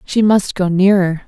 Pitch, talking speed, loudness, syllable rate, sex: 190 Hz, 190 wpm, -14 LUFS, 4.4 syllables/s, female